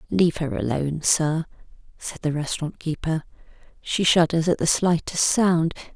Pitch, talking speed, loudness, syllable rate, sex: 165 Hz, 140 wpm, -22 LUFS, 5.0 syllables/s, female